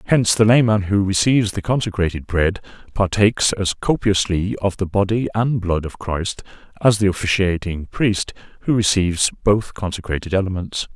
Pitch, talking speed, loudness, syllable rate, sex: 95 Hz, 150 wpm, -19 LUFS, 5.1 syllables/s, male